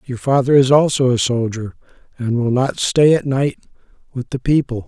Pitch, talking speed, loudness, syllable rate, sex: 130 Hz, 185 wpm, -16 LUFS, 5.1 syllables/s, male